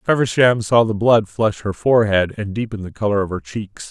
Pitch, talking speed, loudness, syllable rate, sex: 110 Hz, 215 wpm, -18 LUFS, 5.3 syllables/s, male